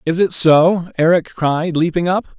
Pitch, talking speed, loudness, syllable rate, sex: 165 Hz, 175 wpm, -15 LUFS, 4.1 syllables/s, male